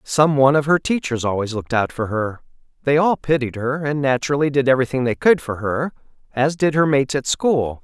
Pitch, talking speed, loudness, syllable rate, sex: 135 Hz, 215 wpm, -19 LUFS, 5.8 syllables/s, male